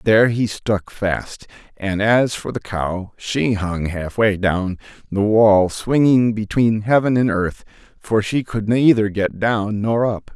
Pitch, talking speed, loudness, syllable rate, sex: 105 Hz, 160 wpm, -18 LUFS, 3.7 syllables/s, male